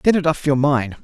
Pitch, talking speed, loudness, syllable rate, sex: 145 Hz, 290 wpm, -18 LUFS, 5.2 syllables/s, male